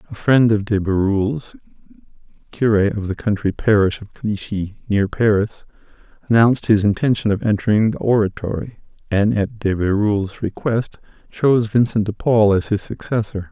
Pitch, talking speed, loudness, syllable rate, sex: 105 Hz, 145 wpm, -18 LUFS, 5.0 syllables/s, male